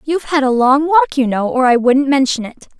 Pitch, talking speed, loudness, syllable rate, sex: 265 Hz, 260 wpm, -14 LUFS, 5.6 syllables/s, female